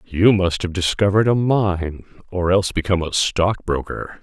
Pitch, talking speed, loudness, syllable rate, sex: 95 Hz, 155 wpm, -19 LUFS, 4.9 syllables/s, male